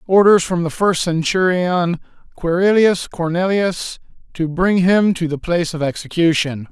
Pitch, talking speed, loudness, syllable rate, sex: 175 Hz, 135 wpm, -17 LUFS, 4.6 syllables/s, male